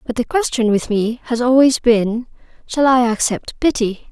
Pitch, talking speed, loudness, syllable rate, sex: 240 Hz, 175 wpm, -16 LUFS, 4.6 syllables/s, female